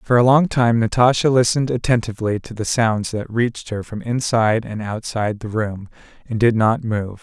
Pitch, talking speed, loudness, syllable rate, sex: 115 Hz, 190 wpm, -19 LUFS, 5.3 syllables/s, male